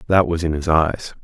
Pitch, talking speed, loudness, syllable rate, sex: 80 Hz, 245 wpm, -19 LUFS, 5.1 syllables/s, male